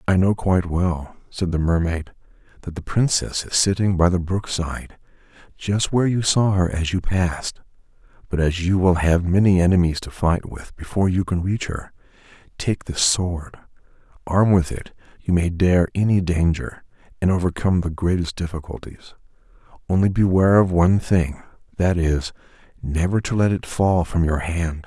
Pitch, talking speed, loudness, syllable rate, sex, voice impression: 90 Hz, 165 wpm, -20 LUFS, 5.0 syllables/s, male, masculine, adult-like, relaxed, slightly weak, soft, slightly muffled, fluent, raspy, cool, intellectual, sincere, calm, mature, wild, slightly modest